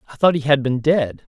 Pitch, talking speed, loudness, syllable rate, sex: 140 Hz, 265 wpm, -18 LUFS, 5.9 syllables/s, male